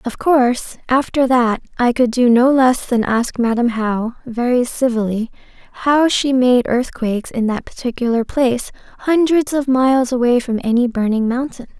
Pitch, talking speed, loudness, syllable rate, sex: 245 Hz, 160 wpm, -16 LUFS, 4.8 syllables/s, female